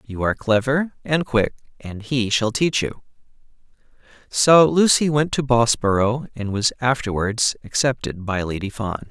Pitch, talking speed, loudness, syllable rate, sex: 120 Hz, 145 wpm, -20 LUFS, 4.5 syllables/s, male